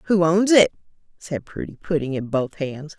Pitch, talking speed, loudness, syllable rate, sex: 160 Hz, 180 wpm, -21 LUFS, 4.8 syllables/s, female